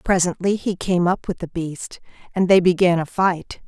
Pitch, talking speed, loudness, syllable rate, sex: 180 Hz, 195 wpm, -20 LUFS, 4.6 syllables/s, female